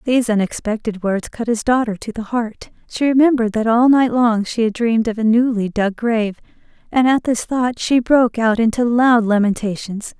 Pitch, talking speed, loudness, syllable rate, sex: 230 Hz, 195 wpm, -17 LUFS, 5.2 syllables/s, female